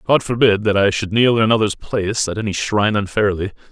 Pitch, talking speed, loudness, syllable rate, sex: 105 Hz, 210 wpm, -17 LUFS, 6.1 syllables/s, male